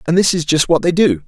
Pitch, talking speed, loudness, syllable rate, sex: 165 Hz, 330 wpm, -14 LUFS, 6.3 syllables/s, male